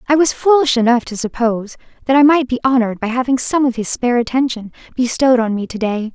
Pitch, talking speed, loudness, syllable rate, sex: 245 Hz, 225 wpm, -15 LUFS, 6.5 syllables/s, female